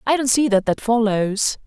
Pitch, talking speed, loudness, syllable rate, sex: 230 Hz, 215 wpm, -19 LUFS, 4.7 syllables/s, female